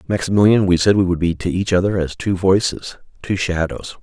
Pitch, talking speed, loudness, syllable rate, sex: 95 Hz, 210 wpm, -17 LUFS, 5.6 syllables/s, male